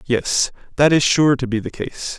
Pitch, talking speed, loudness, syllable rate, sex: 135 Hz, 220 wpm, -18 LUFS, 4.4 syllables/s, male